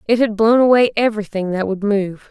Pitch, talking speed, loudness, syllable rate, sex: 210 Hz, 210 wpm, -16 LUFS, 5.7 syllables/s, female